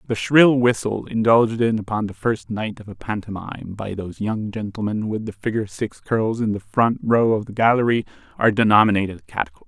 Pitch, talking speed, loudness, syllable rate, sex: 110 Hz, 200 wpm, -20 LUFS, 5.6 syllables/s, male